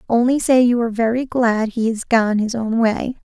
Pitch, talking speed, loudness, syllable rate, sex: 235 Hz, 215 wpm, -18 LUFS, 4.9 syllables/s, female